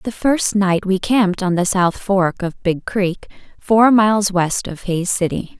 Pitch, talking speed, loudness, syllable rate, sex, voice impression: 195 Hz, 195 wpm, -17 LUFS, 4.1 syllables/s, female, very feminine, adult-like, slightly middle-aged, very thin, very tensed, powerful, very bright, hard, very clear, very fluent, slightly raspy, slightly cute, cool, slightly intellectual, very refreshing, sincere, slightly calm, very unique, very elegant, wild, sweet, strict, intense, very sharp, light